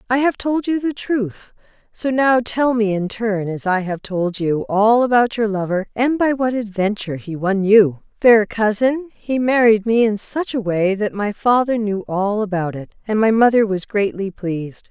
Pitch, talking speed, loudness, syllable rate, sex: 215 Hz, 200 wpm, -18 LUFS, 4.5 syllables/s, female